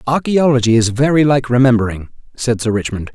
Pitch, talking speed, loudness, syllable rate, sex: 125 Hz, 155 wpm, -14 LUFS, 5.8 syllables/s, male